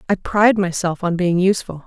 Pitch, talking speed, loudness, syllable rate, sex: 185 Hz, 195 wpm, -18 LUFS, 6.0 syllables/s, female